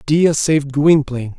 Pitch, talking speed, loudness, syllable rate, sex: 145 Hz, 130 wpm, -15 LUFS, 4.7 syllables/s, male